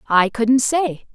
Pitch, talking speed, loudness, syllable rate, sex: 240 Hz, 155 wpm, -18 LUFS, 3.2 syllables/s, female